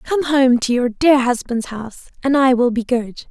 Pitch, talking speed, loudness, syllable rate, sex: 255 Hz, 220 wpm, -16 LUFS, 4.8 syllables/s, female